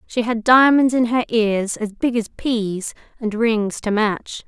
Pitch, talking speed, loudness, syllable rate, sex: 225 Hz, 190 wpm, -19 LUFS, 3.7 syllables/s, female